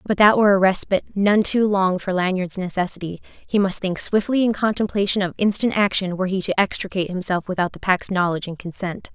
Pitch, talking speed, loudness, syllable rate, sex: 190 Hz, 205 wpm, -20 LUFS, 6.0 syllables/s, female